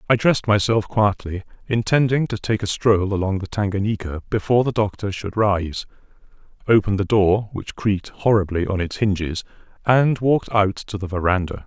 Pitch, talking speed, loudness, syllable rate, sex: 105 Hz, 165 wpm, -20 LUFS, 5.4 syllables/s, male